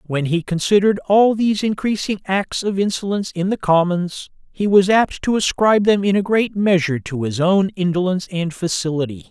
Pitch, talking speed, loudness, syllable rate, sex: 190 Hz, 180 wpm, -18 LUFS, 5.4 syllables/s, male